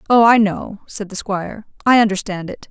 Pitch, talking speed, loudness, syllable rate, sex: 210 Hz, 200 wpm, -17 LUFS, 5.3 syllables/s, female